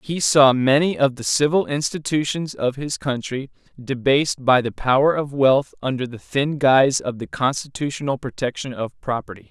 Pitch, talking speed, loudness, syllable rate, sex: 135 Hz, 165 wpm, -20 LUFS, 5.0 syllables/s, male